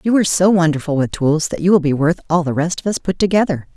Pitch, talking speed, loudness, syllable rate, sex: 170 Hz, 270 wpm, -16 LUFS, 6.3 syllables/s, female